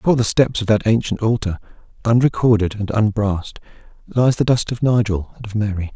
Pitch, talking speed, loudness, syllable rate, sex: 110 Hz, 180 wpm, -18 LUFS, 5.9 syllables/s, male